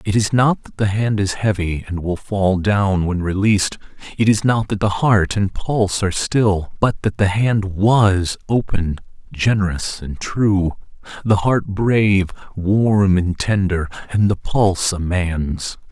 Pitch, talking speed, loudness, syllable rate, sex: 100 Hz, 165 wpm, -18 LUFS, 4.0 syllables/s, male